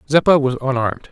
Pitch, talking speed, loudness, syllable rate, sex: 135 Hz, 160 wpm, -17 LUFS, 7.0 syllables/s, male